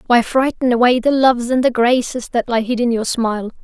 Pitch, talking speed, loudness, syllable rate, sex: 240 Hz, 230 wpm, -16 LUFS, 5.6 syllables/s, female